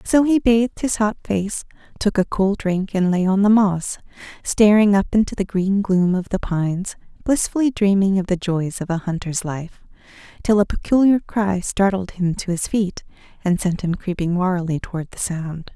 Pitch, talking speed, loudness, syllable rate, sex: 195 Hz, 185 wpm, -20 LUFS, 4.8 syllables/s, female